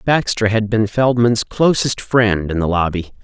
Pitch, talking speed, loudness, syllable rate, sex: 110 Hz, 165 wpm, -16 LUFS, 4.3 syllables/s, male